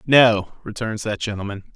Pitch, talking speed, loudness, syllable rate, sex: 110 Hz, 135 wpm, -21 LUFS, 4.8 syllables/s, male